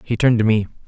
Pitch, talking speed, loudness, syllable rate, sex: 110 Hz, 275 wpm, -17 LUFS, 8.3 syllables/s, male